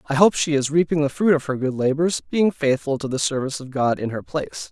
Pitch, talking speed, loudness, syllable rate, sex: 145 Hz, 265 wpm, -21 LUFS, 6.0 syllables/s, male